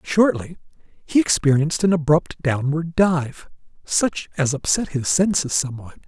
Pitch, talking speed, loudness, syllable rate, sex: 155 Hz, 130 wpm, -20 LUFS, 4.5 syllables/s, male